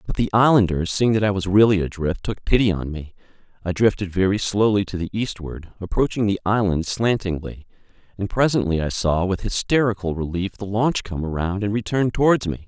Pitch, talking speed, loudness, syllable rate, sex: 100 Hz, 185 wpm, -21 LUFS, 5.4 syllables/s, male